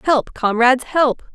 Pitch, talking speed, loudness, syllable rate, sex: 255 Hz, 135 wpm, -17 LUFS, 4.4 syllables/s, female